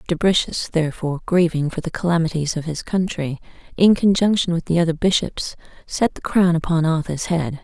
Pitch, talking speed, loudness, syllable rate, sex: 165 Hz, 165 wpm, -20 LUFS, 5.5 syllables/s, female